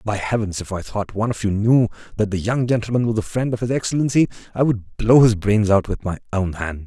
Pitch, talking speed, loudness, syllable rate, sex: 110 Hz, 255 wpm, -20 LUFS, 6.0 syllables/s, male